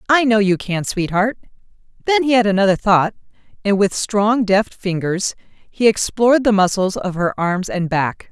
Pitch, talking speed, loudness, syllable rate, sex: 205 Hz, 175 wpm, -17 LUFS, 4.6 syllables/s, female